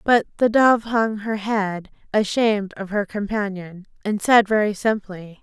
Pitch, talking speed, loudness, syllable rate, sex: 210 Hz, 155 wpm, -20 LUFS, 4.2 syllables/s, female